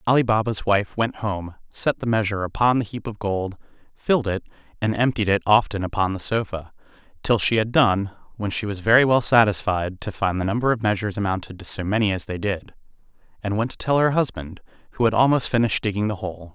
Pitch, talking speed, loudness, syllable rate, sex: 105 Hz, 210 wpm, -22 LUFS, 6.0 syllables/s, male